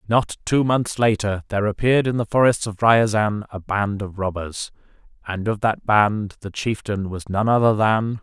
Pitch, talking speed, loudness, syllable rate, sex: 105 Hz, 180 wpm, -21 LUFS, 4.7 syllables/s, male